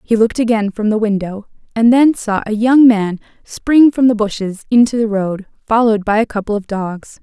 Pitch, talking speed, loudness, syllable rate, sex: 220 Hz, 210 wpm, -14 LUFS, 5.2 syllables/s, female